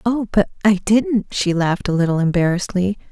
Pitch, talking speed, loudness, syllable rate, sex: 195 Hz, 175 wpm, -18 LUFS, 5.6 syllables/s, female